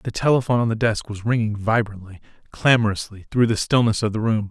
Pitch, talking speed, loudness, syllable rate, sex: 110 Hz, 200 wpm, -21 LUFS, 6.2 syllables/s, male